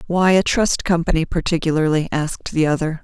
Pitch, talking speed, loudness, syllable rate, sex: 165 Hz, 160 wpm, -18 LUFS, 5.6 syllables/s, female